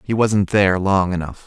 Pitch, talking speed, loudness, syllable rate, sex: 100 Hz, 205 wpm, -18 LUFS, 5.1 syllables/s, male